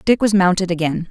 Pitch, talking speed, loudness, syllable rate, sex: 185 Hz, 215 wpm, -16 LUFS, 5.9 syllables/s, female